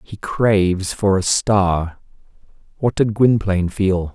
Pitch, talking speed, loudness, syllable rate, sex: 100 Hz, 130 wpm, -18 LUFS, 3.7 syllables/s, male